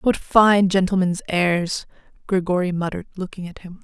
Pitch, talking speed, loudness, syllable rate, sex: 185 Hz, 140 wpm, -20 LUFS, 4.9 syllables/s, female